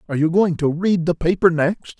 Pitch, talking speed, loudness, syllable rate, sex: 170 Hz, 240 wpm, -18 LUFS, 5.5 syllables/s, male